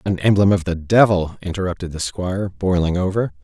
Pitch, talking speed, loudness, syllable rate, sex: 90 Hz, 175 wpm, -19 LUFS, 5.7 syllables/s, male